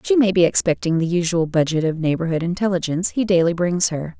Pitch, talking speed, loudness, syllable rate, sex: 175 Hz, 200 wpm, -19 LUFS, 6.1 syllables/s, female